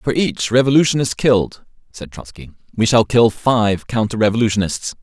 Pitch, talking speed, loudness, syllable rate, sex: 115 Hz, 145 wpm, -16 LUFS, 5.1 syllables/s, male